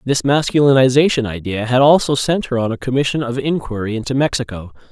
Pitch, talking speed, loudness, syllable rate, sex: 130 Hz, 170 wpm, -16 LUFS, 6.1 syllables/s, male